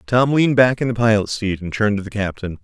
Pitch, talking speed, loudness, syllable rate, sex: 110 Hz, 275 wpm, -18 LUFS, 6.5 syllables/s, male